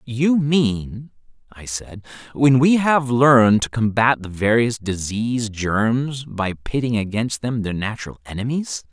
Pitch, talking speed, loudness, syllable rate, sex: 120 Hz, 140 wpm, -19 LUFS, 4.0 syllables/s, male